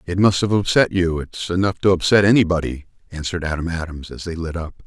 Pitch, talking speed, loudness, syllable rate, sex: 90 Hz, 195 wpm, -19 LUFS, 6.0 syllables/s, male